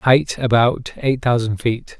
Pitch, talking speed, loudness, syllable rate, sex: 120 Hz, 150 wpm, -18 LUFS, 3.7 syllables/s, male